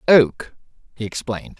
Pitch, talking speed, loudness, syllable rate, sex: 120 Hz, 115 wpm, -21 LUFS, 4.9 syllables/s, male